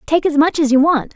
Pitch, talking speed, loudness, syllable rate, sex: 300 Hz, 310 wpm, -14 LUFS, 5.8 syllables/s, female